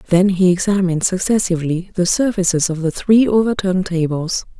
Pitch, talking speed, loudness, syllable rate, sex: 185 Hz, 145 wpm, -16 LUFS, 5.7 syllables/s, female